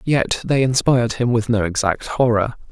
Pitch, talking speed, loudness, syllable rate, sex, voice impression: 120 Hz, 175 wpm, -18 LUFS, 4.9 syllables/s, male, masculine, adult-like, relaxed, slightly weak, muffled, raspy, intellectual, calm, slightly mature, slightly reassuring, wild, kind, modest